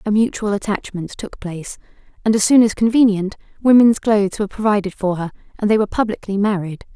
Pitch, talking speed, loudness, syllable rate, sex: 205 Hz, 180 wpm, -17 LUFS, 6.2 syllables/s, female